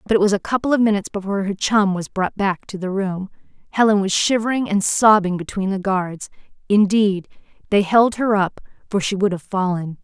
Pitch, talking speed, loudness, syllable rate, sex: 200 Hz, 195 wpm, -19 LUFS, 5.5 syllables/s, female